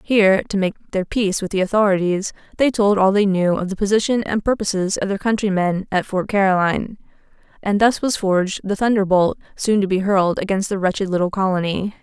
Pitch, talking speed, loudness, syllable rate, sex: 195 Hz, 195 wpm, -19 LUFS, 5.8 syllables/s, female